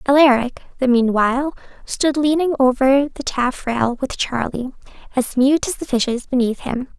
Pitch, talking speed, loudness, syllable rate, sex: 265 Hz, 145 wpm, -18 LUFS, 4.6 syllables/s, female